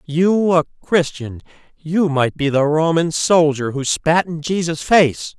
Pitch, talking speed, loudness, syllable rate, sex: 160 Hz, 145 wpm, -17 LUFS, 3.8 syllables/s, male